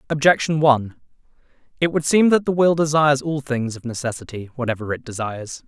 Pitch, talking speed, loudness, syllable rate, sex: 140 Hz, 170 wpm, -20 LUFS, 6.1 syllables/s, male